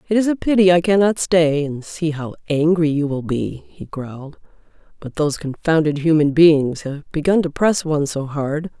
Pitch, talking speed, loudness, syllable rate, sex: 160 Hz, 190 wpm, -18 LUFS, 4.9 syllables/s, female